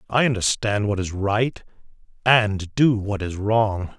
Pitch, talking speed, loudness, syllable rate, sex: 105 Hz, 150 wpm, -21 LUFS, 3.8 syllables/s, male